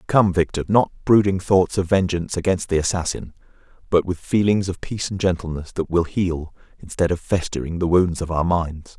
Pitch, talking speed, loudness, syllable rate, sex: 90 Hz, 185 wpm, -21 LUFS, 5.4 syllables/s, male